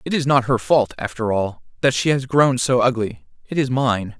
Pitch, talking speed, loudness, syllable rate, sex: 125 Hz, 230 wpm, -19 LUFS, 4.9 syllables/s, male